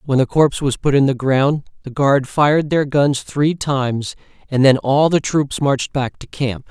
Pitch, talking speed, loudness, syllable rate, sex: 140 Hz, 215 wpm, -17 LUFS, 4.6 syllables/s, male